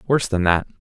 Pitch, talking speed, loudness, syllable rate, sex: 105 Hz, 205 wpm, -20 LUFS, 7.1 syllables/s, male